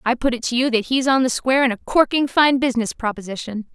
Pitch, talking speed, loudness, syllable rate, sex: 250 Hz, 255 wpm, -19 LUFS, 6.4 syllables/s, female